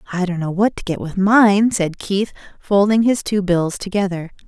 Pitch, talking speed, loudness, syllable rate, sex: 195 Hz, 200 wpm, -18 LUFS, 4.7 syllables/s, female